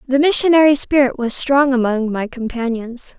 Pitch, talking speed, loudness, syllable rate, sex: 260 Hz, 150 wpm, -15 LUFS, 4.9 syllables/s, female